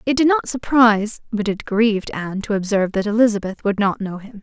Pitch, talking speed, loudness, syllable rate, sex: 215 Hz, 215 wpm, -19 LUFS, 5.9 syllables/s, female